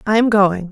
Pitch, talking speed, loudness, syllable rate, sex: 205 Hz, 250 wpm, -14 LUFS, 5.1 syllables/s, female